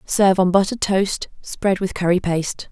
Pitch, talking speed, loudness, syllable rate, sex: 190 Hz, 175 wpm, -19 LUFS, 5.2 syllables/s, female